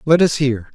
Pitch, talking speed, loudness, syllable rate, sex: 140 Hz, 240 wpm, -16 LUFS, 4.9 syllables/s, male